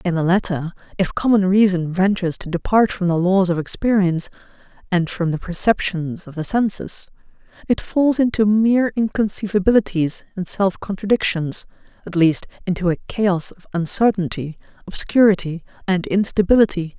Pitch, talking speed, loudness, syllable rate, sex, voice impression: 190 Hz, 140 wpm, -19 LUFS, 5.2 syllables/s, female, very feminine, very adult-like, very middle-aged, thin, relaxed, weak, slightly dark, very soft, slightly muffled, fluent, slightly cute, cool, very intellectual, slightly refreshing, very sincere, very calm, friendly, reassuring, unique, very elegant, sweet, slightly lively, kind, intense, slightly sharp, very modest, light